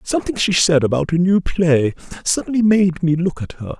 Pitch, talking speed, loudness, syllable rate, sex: 175 Hz, 175 wpm, -17 LUFS, 5.3 syllables/s, male